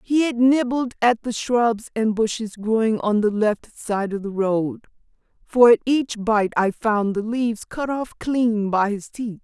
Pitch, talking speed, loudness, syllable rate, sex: 225 Hz, 190 wpm, -21 LUFS, 4.0 syllables/s, female